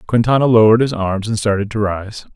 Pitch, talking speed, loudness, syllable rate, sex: 110 Hz, 205 wpm, -15 LUFS, 6.1 syllables/s, male